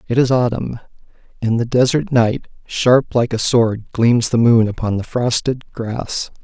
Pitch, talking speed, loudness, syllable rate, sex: 115 Hz, 170 wpm, -17 LUFS, 4.0 syllables/s, male